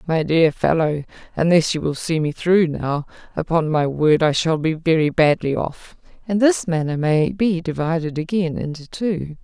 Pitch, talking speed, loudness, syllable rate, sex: 165 Hz, 180 wpm, -19 LUFS, 4.5 syllables/s, female